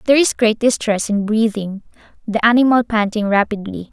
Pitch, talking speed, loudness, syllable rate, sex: 220 Hz, 155 wpm, -16 LUFS, 5.4 syllables/s, female